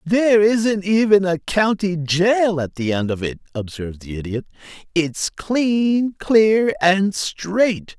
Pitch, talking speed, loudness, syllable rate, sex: 185 Hz, 145 wpm, -18 LUFS, 3.6 syllables/s, male